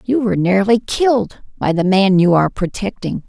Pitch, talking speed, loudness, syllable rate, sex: 200 Hz, 185 wpm, -16 LUFS, 5.3 syllables/s, female